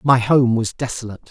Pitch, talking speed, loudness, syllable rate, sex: 120 Hz, 185 wpm, -18 LUFS, 6.2 syllables/s, male